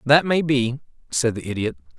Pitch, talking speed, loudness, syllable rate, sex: 120 Hz, 180 wpm, -22 LUFS, 5.1 syllables/s, male